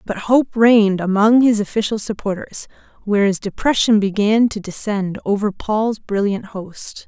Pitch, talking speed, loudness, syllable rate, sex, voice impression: 210 Hz, 135 wpm, -17 LUFS, 4.4 syllables/s, female, very feminine, slightly middle-aged, very thin, tensed, powerful, bright, very hard, very clear, fluent, cool, very intellectual, refreshing, slightly sincere, slightly calm, slightly friendly, slightly reassuring, very unique, slightly elegant, very wild, slightly sweet, lively, strict, slightly intense